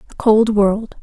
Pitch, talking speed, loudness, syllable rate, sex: 215 Hz, 175 wpm, -15 LUFS, 3.9 syllables/s, female